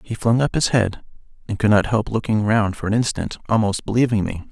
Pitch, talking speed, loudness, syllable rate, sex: 110 Hz, 225 wpm, -20 LUFS, 5.7 syllables/s, male